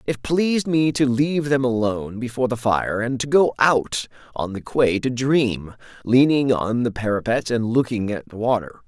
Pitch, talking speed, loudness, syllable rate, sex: 125 Hz, 190 wpm, -21 LUFS, 4.8 syllables/s, male